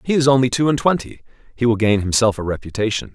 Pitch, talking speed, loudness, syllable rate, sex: 120 Hz, 210 wpm, -18 LUFS, 6.6 syllables/s, male